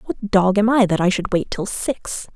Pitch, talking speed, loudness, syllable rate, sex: 200 Hz, 255 wpm, -19 LUFS, 4.7 syllables/s, female